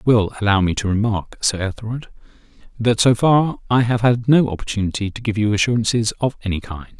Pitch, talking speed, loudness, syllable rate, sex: 110 Hz, 195 wpm, -19 LUFS, 6.0 syllables/s, male